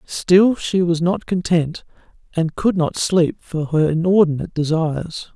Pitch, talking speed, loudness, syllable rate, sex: 170 Hz, 145 wpm, -18 LUFS, 4.3 syllables/s, male